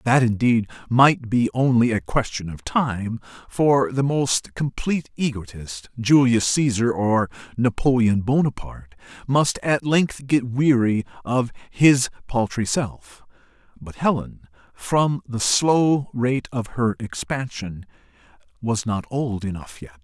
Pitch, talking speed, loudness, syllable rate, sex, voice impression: 120 Hz, 125 wpm, -21 LUFS, 3.8 syllables/s, male, very masculine, very middle-aged, very thick, very tensed, very powerful, very bright, very soft, very clear, very fluent, raspy, cool, slightly intellectual, very refreshing, slightly sincere, slightly calm, mature, very friendly, very reassuring, very unique, very wild, sweet, very lively, slightly kind, intense, slightly sharp, light